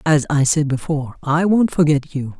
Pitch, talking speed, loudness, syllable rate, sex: 150 Hz, 200 wpm, -18 LUFS, 5.0 syllables/s, female